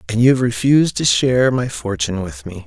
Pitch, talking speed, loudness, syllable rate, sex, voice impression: 115 Hz, 225 wpm, -16 LUFS, 6.0 syllables/s, male, very masculine, very adult-like, very thick, tensed, slightly powerful, slightly dark, soft, slightly muffled, fluent, slightly raspy, very cool, intellectual, refreshing, very sincere, very calm, mature, friendly, reassuring, unique, elegant, slightly wild, sweet, lively, kind